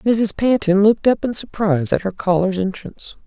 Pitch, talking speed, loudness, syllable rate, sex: 200 Hz, 185 wpm, -18 LUFS, 5.5 syllables/s, female